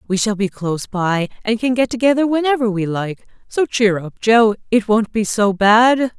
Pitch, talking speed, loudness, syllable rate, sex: 220 Hz, 205 wpm, -17 LUFS, 4.8 syllables/s, female